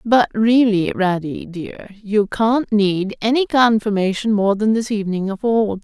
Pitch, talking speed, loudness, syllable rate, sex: 210 Hz, 145 wpm, -17 LUFS, 4.2 syllables/s, female